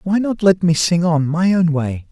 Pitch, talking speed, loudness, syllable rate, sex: 170 Hz, 255 wpm, -16 LUFS, 4.5 syllables/s, male